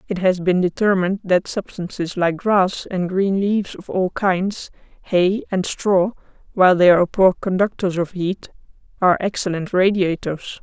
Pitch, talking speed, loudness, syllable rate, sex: 185 Hz, 150 wpm, -19 LUFS, 4.7 syllables/s, female